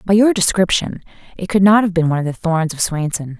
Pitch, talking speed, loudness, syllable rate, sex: 180 Hz, 245 wpm, -16 LUFS, 6.1 syllables/s, female